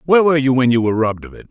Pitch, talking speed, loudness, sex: 130 Hz, 360 wpm, -15 LUFS, male